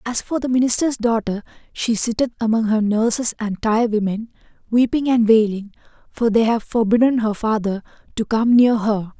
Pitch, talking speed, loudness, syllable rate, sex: 225 Hz, 165 wpm, -19 LUFS, 5.2 syllables/s, female